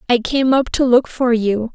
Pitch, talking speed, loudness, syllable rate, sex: 245 Hz, 240 wpm, -16 LUFS, 4.5 syllables/s, female